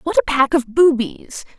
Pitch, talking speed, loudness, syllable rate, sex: 275 Hz, 190 wpm, -16 LUFS, 4.7 syllables/s, female